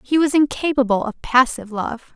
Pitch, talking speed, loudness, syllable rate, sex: 255 Hz, 165 wpm, -19 LUFS, 5.4 syllables/s, female